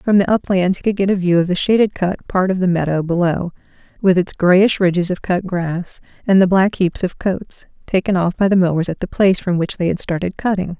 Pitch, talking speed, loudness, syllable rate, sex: 185 Hz, 245 wpm, -17 LUFS, 5.5 syllables/s, female